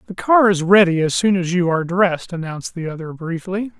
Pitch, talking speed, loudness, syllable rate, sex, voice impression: 180 Hz, 220 wpm, -18 LUFS, 5.9 syllables/s, male, masculine, adult-like, slightly middle-aged, slightly thick, relaxed, slightly weak, slightly dark, slightly soft, slightly muffled, slightly fluent, slightly cool, slightly intellectual, sincere, calm, slightly friendly, slightly reassuring, very unique, slightly wild, lively, kind, very modest